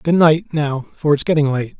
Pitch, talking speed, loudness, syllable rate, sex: 150 Hz, 270 wpm, -17 LUFS, 6.1 syllables/s, male